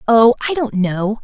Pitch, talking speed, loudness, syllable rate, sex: 225 Hz, 195 wpm, -16 LUFS, 4.4 syllables/s, female